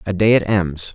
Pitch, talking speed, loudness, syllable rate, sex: 95 Hz, 255 wpm, -17 LUFS, 4.8 syllables/s, male